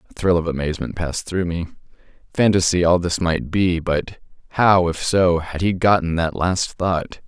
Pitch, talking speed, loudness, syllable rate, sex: 85 Hz, 175 wpm, -19 LUFS, 4.9 syllables/s, male